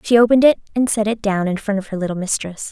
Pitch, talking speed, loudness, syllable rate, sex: 210 Hz, 285 wpm, -18 LUFS, 7.0 syllables/s, female